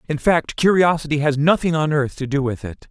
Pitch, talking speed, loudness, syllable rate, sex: 150 Hz, 225 wpm, -18 LUFS, 5.5 syllables/s, male